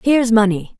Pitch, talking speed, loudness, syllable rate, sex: 230 Hz, 230 wpm, -15 LUFS, 7.3 syllables/s, female